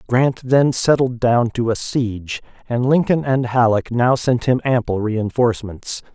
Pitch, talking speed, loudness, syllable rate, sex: 120 Hz, 155 wpm, -18 LUFS, 4.3 syllables/s, male